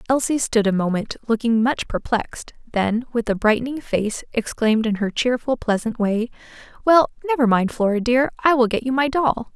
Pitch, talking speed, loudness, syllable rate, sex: 235 Hz, 180 wpm, -20 LUFS, 5.1 syllables/s, female